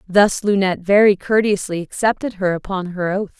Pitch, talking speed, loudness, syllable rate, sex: 195 Hz, 160 wpm, -18 LUFS, 5.2 syllables/s, female